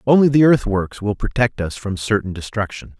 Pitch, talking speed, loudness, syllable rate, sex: 110 Hz, 180 wpm, -19 LUFS, 5.3 syllables/s, male